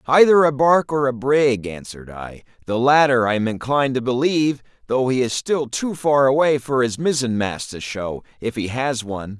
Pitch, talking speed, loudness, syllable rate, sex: 130 Hz, 205 wpm, -19 LUFS, 5.1 syllables/s, male